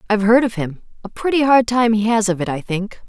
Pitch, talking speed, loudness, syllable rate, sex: 215 Hz, 275 wpm, -17 LUFS, 6.0 syllables/s, female